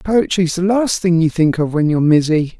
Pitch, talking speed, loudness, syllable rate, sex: 165 Hz, 230 wpm, -15 LUFS, 5.3 syllables/s, male